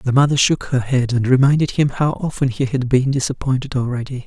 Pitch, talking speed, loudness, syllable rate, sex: 130 Hz, 210 wpm, -18 LUFS, 5.7 syllables/s, male